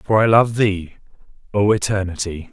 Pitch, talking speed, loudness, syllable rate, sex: 100 Hz, 145 wpm, -18 LUFS, 4.8 syllables/s, male